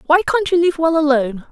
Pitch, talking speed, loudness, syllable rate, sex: 310 Hz, 240 wpm, -16 LUFS, 7.0 syllables/s, female